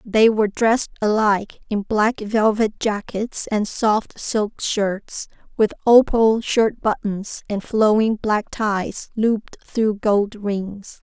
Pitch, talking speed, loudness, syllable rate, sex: 215 Hz, 130 wpm, -20 LUFS, 3.4 syllables/s, female